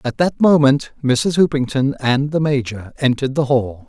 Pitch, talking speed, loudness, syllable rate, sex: 135 Hz, 170 wpm, -17 LUFS, 4.8 syllables/s, male